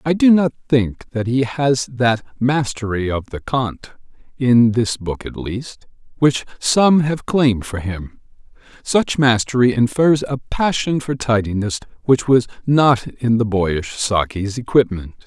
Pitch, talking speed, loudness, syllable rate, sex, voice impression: 120 Hz, 140 wpm, -18 LUFS, 4.0 syllables/s, male, masculine, middle-aged, thick, tensed, powerful, slightly hard, clear, raspy, mature, reassuring, wild, lively, slightly strict